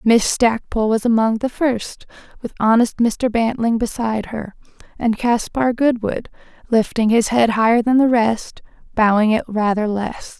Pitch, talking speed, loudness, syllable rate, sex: 230 Hz, 145 wpm, -18 LUFS, 4.5 syllables/s, female